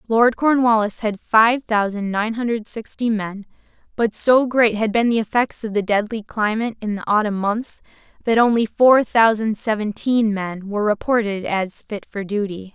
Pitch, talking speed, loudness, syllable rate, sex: 220 Hz, 170 wpm, -19 LUFS, 4.7 syllables/s, female